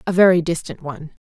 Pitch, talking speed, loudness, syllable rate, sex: 165 Hz, 190 wpm, -17 LUFS, 6.8 syllables/s, female